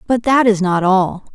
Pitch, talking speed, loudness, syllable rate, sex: 205 Hz, 225 wpm, -14 LUFS, 4.4 syllables/s, female